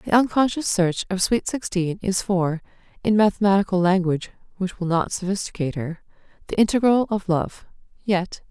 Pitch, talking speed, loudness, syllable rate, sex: 190 Hz, 140 wpm, -22 LUFS, 3.2 syllables/s, female